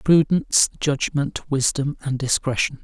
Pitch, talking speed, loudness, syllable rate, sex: 140 Hz, 105 wpm, -21 LUFS, 4.2 syllables/s, male